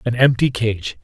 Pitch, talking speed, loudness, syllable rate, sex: 120 Hz, 175 wpm, -18 LUFS, 4.5 syllables/s, male